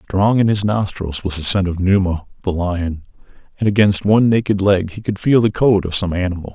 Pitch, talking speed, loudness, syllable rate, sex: 95 Hz, 220 wpm, -17 LUFS, 5.4 syllables/s, male